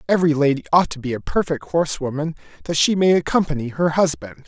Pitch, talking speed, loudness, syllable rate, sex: 155 Hz, 190 wpm, -20 LUFS, 6.6 syllables/s, male